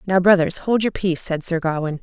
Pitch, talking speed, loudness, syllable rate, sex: 180 Hz, 235 wpm, -19 LUFS, 5.9 syllables/s, female